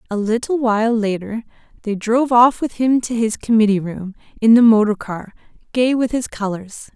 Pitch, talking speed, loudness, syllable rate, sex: 225 Hz, 180 wpm, -17 LUFS, 5.2 syllables/s, female